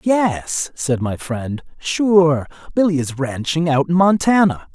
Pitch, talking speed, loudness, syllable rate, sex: 160 Hz, 125 wpm, -18 LUFS, 3.6 syllables/s, male